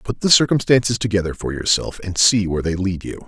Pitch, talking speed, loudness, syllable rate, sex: 100 Hz, 220 wpm, -18 LUFS, 6.1 syllables/s, male